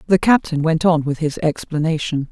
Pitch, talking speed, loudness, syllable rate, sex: 160 Hz, 180 wpm, -18 LUFS, 5.2 syllables/s, female